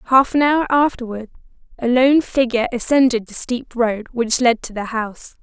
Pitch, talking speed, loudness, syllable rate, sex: 245 Hz, 175 wpm, -18 LUFS, 5.1 syllables/s, female